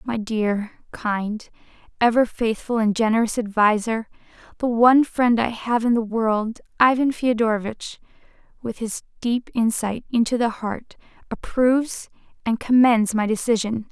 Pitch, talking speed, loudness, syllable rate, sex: 225 Hz, 130 wpm, -21 LUFS, 4.5 syllables/s, female